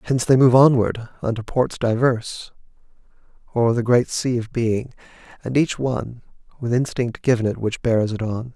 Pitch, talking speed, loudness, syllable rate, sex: 120 Hz, 170 wpm, -20 LUFS, 5.1 syllables/s, male